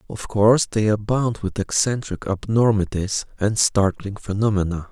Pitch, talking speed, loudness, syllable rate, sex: 105 Hz, 120 wpm, -21 LUFS, 4.6 syllables/s, male